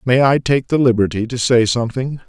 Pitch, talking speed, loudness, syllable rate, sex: 125 Hz, 210 wpm, -16 LUFS, 5.7 syllables/s, male